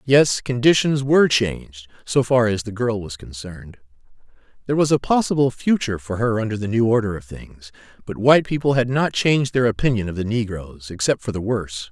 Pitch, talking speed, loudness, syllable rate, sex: 115 Hz, 195 wpm, -19 LUFS, 5.8 syllables/s, male